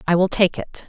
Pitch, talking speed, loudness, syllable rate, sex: 180 Hz, 275 wpm, -19 LUFS, 5.5 syllables/s, female